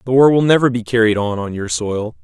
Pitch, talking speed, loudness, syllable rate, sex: 115 Hz, 270 wpm, -16 LUFS, 5.9 syllables/s, male